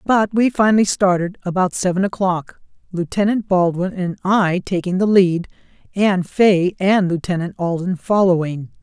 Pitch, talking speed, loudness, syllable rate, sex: 185 Hz, 135 wpm, -18 LUFS, 4.6 syllables/s, female